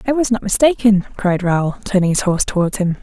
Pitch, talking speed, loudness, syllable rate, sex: 200 Hz, 220 wpm, -16 LUFS, 6.0 syllables/s, female